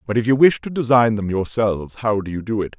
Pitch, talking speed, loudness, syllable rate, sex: 115 Hz, 280 wpm, -19 LUFS, 6.0 syllables/s, male